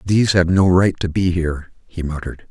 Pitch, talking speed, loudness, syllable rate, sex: 90 Hz, 215 wpm, -18 LUFS, 5.9 syllables/s, male